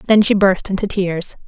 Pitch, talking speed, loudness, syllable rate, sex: 190 Hz, 205 wpm, -16 LUFS, 5.0 syllables/s, female